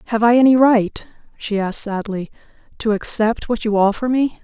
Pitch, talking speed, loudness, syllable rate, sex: 220 Hz, 175 wpm, -17 LUFS, 5.3 syllables/s, female